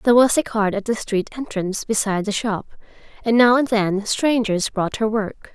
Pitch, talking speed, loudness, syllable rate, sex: 220 Hz, 205 wpm, -20 LUFS, 5.2 syllables/s, female